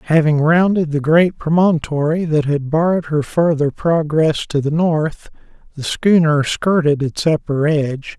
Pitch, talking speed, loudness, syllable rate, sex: 155 Hz, 145 wpm, -16 LUFS, 4.3 syllables/s, male